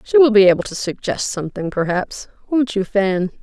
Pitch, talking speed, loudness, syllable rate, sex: 210 Hz, 175 wpm, -18 LUFS, 5.3 syllables/s, female